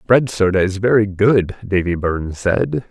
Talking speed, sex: 145 wpm, male